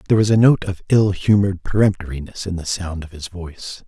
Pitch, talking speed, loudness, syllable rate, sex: 95 Hz, 215 wpm, -18 LUFS, 6.1 syllables/s, male